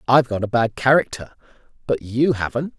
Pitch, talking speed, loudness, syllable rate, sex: 120 Hz, 170 wpm, -20 LUFS, 5.7 syllables/s, male